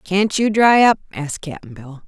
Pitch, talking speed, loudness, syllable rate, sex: 185 Hz, 205 wpm, -16 LUFS, 4.4 syllables/s, female